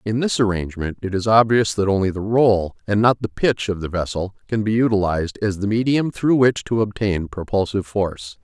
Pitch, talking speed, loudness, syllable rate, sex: 105 Hz, 205 wpm, -20 LUFS, 5.5 syllables/s, male